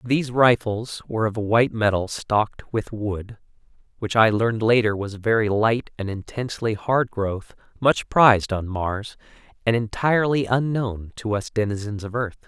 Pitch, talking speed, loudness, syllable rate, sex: 110 Hz, 165 wpm, -22 LUFS, 4.9 syllables/s, male